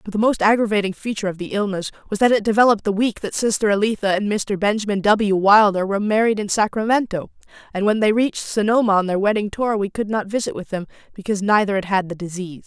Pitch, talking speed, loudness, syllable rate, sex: 205 Hz, 225 wpm, -19 LUFS, 6.6 syllables/s, female